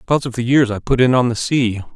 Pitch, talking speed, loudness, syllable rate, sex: 120 Hz, 305 wpm, -16 LUFS, 7.0 syllables/s, male